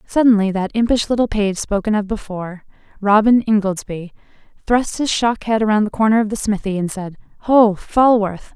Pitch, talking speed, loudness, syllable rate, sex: 210 Hz, 170 wpm, -17 LUFS, 5.3 syllables/s, female